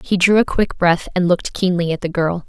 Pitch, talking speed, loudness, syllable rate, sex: 180 Hz, 265 wpm, -17 LUFS, 5.7 syllables/s, female